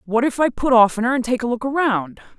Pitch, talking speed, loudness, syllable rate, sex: 240 Hz, 300 wpm, -18 LUFS, 5.7 syllables/s, female